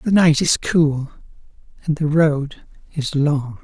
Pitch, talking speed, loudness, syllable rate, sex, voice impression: 150 Hz, 150 wpm, -18 LUFS, 3.6 syllables/s, male, masculine, slightly old, slightly refreshing, sincere, calm, elegant, kind